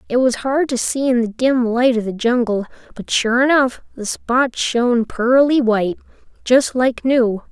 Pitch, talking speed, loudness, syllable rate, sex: 245 Hz, 185 wpm, -17 LUFS, 4.4 syllables/s, female